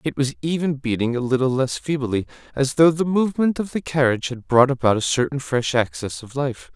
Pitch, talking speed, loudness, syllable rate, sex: 135 Hz, 215 wpm, -21 LUFS, 5.6 syllables/s, male